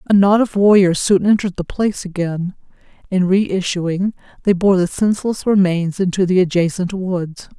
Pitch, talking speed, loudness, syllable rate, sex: 190 Hz, 160 wpm, -17 LUFS, 4.9 syllables/s, female